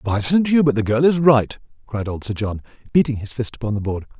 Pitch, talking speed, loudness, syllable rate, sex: 120 Hz, 245 wpm, -19 LUFS, 5.7 syllables/s, male